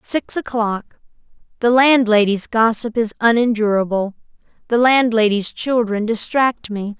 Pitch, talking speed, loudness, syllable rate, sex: 225 Hz, 95 wpm, -17 LUFS, 4.4 syllables/s, female